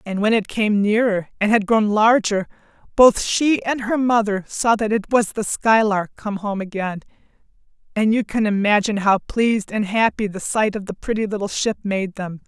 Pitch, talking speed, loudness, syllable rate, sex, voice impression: 210 Hz, 190 wpm, -19 LUFS, 4.9 syllables/s, female, feminine, adult-like, slightly clear, slightly intellectual, slightly refreshing